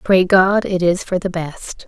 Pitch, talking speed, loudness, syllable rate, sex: 185 Hz, 225 wpm, -16 LUFS, 4.0 syllables/s, female